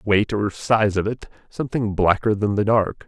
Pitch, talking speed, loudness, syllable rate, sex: 105 Hz, 195 wpm, -21 LUFS, 4.7 syllables/s, male